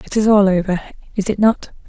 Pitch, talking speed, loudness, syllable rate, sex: 200 Hz, 225 wpm, -16 LUFS, 6.2 syllables/s, female